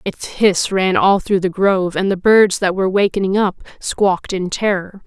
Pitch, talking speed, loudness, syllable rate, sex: 190 Hz, 200 wpm, -16 LUFS, 4.9 syllables/s, female